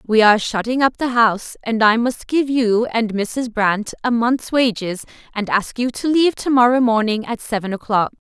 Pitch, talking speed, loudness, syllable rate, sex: 230 Hz, 205 wpm, -18 LUFS, 4.9 syllables/s, female